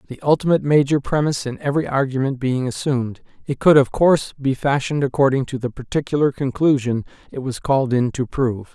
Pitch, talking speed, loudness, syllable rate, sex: 135 Hz, 180 wpm, -19 LUFS, 6.3 syllables/s, male